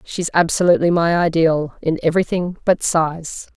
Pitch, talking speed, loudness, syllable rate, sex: 165 Hz, 115 wpm, -17 LUFS, 4.9 syllables/s, female